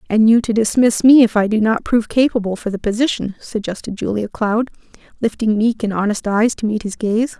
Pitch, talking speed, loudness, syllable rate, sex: 220 Hz, 210 wpm, -17 LUFS, 5.6 syllables/s, female